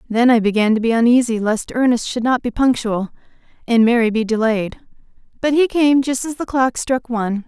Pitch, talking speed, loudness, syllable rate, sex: 240 Hz, 200 wpm, -17 LUFS, 5.4 syllables/s, female